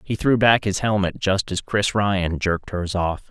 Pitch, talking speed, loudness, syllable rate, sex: 100 Hz, 220 wpm, -21 LUFS, 4.5 syllables/s, male